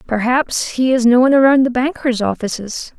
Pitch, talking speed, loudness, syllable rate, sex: 250 Hz, 160 wpm, -15 LUFS, 4.6 syllables/s, female